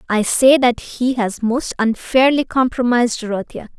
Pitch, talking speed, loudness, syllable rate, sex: 240 Hz, 145 wpm, -16 LUFS, 4.7 syllables/s, female